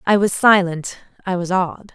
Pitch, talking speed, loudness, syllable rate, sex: 185 Hz, 185 wpm, -18 LUFS, 4.6 syllables/s, female